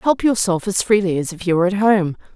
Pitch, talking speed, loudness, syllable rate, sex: 195 Hz, 255 wpm, -18 LUFS, 6.0 syllables/s, female